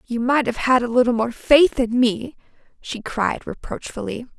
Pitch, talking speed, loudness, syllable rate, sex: 245 Hz, 180 wpm, -20 LUFS, 4.6 syllables/s, female